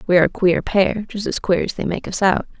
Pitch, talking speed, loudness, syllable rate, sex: 190 Hz, 275 wpm, -19 LUFS, 5.9 syllables/s, female